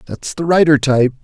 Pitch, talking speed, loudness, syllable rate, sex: 140 Hz, 195 wpm, -14 LUFS, 6.2 syllables/s, male